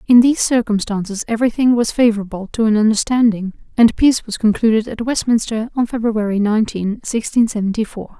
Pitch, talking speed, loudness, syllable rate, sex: 220 Hz, 145 wpm, -16 LUFS, 6.0 syllables/s, female